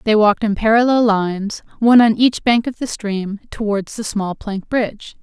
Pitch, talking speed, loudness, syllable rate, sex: 215 Hz, 195 wpm, -17 LUFS, 5.0 syllables/s, female